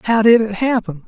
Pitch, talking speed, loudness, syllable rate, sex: 215 Hz, 225 wpm, -15 LUFS, 5.6 syllables/s, male